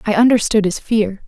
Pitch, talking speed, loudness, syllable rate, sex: 215 Hz, 190 wpm, -16 LUFS, 5.3 syllables/s, female